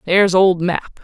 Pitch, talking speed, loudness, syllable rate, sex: 185 Hz, 175 wpm, -15 LUFS, 4.6 syllables/s, female